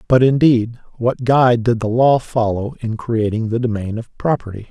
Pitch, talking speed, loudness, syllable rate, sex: 120 Hz, 180 wpm, -17 LUFS, 4.9 syllables/s, male